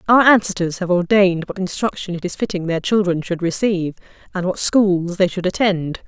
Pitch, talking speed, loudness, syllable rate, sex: 185 Hz, 190 wpm, -18 LUFS, 5.4 syllables/s, female